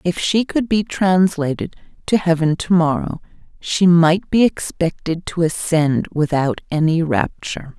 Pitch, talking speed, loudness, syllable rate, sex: 170 Hz, 140 wpm, -18 LUFS, 4.2 syllables/s, female